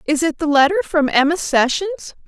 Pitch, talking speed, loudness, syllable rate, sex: 310 Hz, 185 wpm, -17 LUFS, 6.1 syllables/s, female